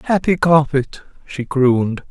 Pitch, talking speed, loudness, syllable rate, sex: 145 Hz, 115 wpm, -16 LUFS, 4.3 syllables/s, male